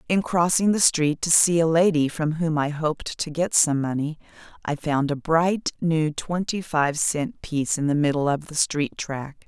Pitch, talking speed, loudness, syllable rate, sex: 155 Hz, 205 wpm, -22 LUFS, 4.5 syllables/s, female